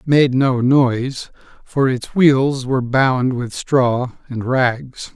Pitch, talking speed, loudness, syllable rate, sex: 130 Hz, 150 wpm, -17 LUFS, 3.2 syllables/s, male